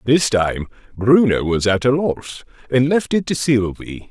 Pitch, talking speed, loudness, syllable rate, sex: 125 Hz, 175 wpm, -17 LUFS, 4.1 syllables/s, male